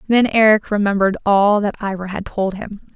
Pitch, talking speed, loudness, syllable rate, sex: 205 Hz, 185 wpm, -17 LUFS, 5.4 syllables/s, female